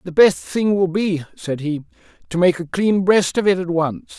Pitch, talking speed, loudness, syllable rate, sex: 175 Hz, 230 wpm, -19 LUFS, 4.6 syllables/s, male